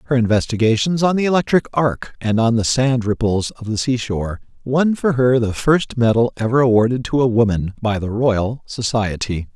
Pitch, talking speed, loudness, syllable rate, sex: 120 Hz, 180 wpm, -18 LUFS, 5.1 syllables/s, male